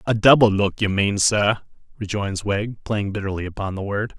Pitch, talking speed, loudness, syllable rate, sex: 100 Hz, 185 wpm, -21 LUFS, 4.9 syllables/s, male